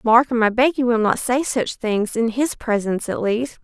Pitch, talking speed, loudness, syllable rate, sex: 235 Hz, 230 wpm, -20 LUFS, 4.9 syllables/s, female